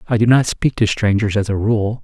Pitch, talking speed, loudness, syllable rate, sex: 110 Hz, 265 wpm, -16 LUFS, 5.4 syllables/s, male